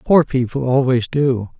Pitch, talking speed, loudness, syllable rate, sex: 130 Hz, 150 wpm, -17 LUFS, 4.3 syllables/s, male